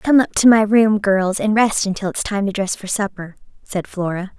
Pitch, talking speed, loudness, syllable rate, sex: 205 Hz, 235 wpm, -17 LUFS, 5.0 syllables/s, female